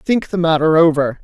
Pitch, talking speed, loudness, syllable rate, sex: 165 Hz, 195 wpm, -14 LUFS, 5.0 syllables/s, male